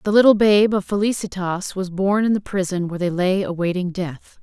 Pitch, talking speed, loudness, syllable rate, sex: 190 Hz, 205 wpm, -20 LUFS, 5.3 syllables/s, female